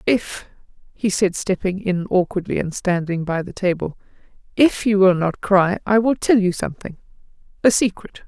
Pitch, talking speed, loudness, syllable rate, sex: 190 Hz, 160 wpm, -19 LUFS, 4.9 syllables/s, female